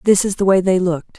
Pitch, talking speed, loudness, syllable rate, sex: 185 Hz, 305 wpm, -16 LUFS, 6.3 syllables/s, female